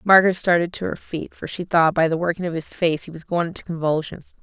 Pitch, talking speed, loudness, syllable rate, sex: 170 Hz, 245 wpm, -21 LUFS, 6.2 syllables/s, female